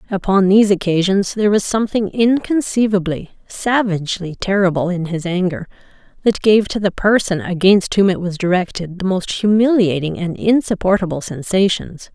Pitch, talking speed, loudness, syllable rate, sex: 195 Hz, 140 wpm, -16 LUFS, 5.1 syllables/s, female